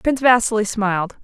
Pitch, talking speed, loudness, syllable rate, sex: 220 Hz, 145 wpm, -17 LUFS, 5.9 syllables/s, female